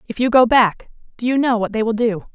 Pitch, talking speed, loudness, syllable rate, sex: 230 Hz, 280 wpm, -17 LUFS, 5.9 syllables/s, female